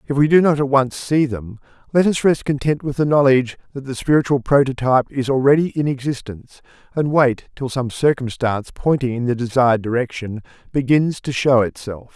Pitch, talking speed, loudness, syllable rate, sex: 135 Hz, 185 wpm, -18 LUFS, 5.6 syllables/s, male